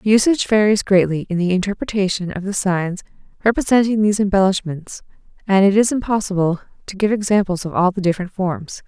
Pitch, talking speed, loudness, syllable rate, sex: 195 Hz, 160 wpm, -18 LUFS, 6.0 syllables/s, female